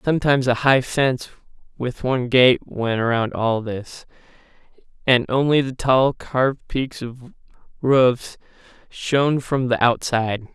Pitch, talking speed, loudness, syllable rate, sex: 125 Hz, 130 wpm, -20 LUFS, 4.1 syllables/s, male